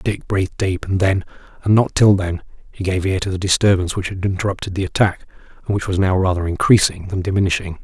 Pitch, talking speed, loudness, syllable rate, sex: 95 Hz, 215 wpm, -18 LUFS, 6.4 syllables/s, male